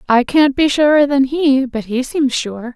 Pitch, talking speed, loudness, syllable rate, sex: 270 Hz, 215 wpm, -14 LUFS, 4.3 syllables/s, female